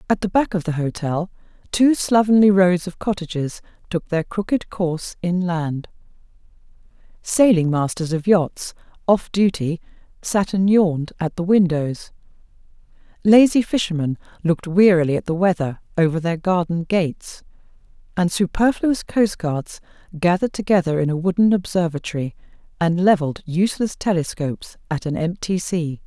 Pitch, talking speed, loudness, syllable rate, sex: 180 Hz, 130 wpm, -20 LUFS, 5.0 syllables/s, female